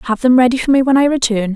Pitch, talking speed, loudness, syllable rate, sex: 245 Hz, 310 wpm, -13 LUFS, 7.3 syllables/s, female